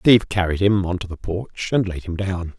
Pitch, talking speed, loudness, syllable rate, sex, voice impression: 95 Hz, 255 wpm, -21 LUFS, 5.1 syllables/s, male, very masculine, old, very thick, tensed, very powerful, dark, slightly soft, muffled, very fluent, raspy, cool, slightly intellectual, slightly sincere, calm, very mature, slightly friendly, slightly reassuring, slightly unique, elegant, very wild, sweet, lively, slightly kind, intense